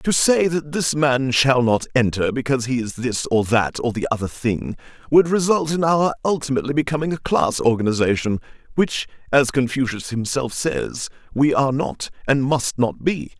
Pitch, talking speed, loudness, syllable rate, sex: 135 Hz, 175 wpm, -20 LUFS, 4.9 syllables/s, male